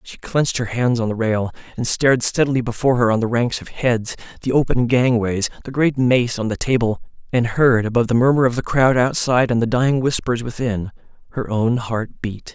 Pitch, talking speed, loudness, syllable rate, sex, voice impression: 120 Hz, 210 wpm, -19 LUFS, 5.6 syllables/s, male, masculine, slightly young, adult-like, slightly thick, tensed, slightly powerful, slightly bright, slightly hard, clear, fluent, cool, slightly intellectual, refreshing, very sincere, calm, friendly, reassuring, slightly unique, elegant, sweet, slightly lively, very kind, modest